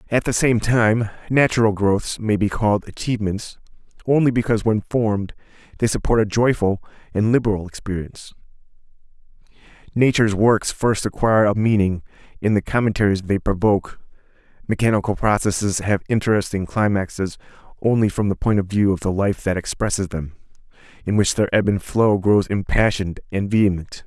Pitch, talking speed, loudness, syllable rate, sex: 105 Hz, 145 wpm, -20 LUFS, 5.6 syllables/s, male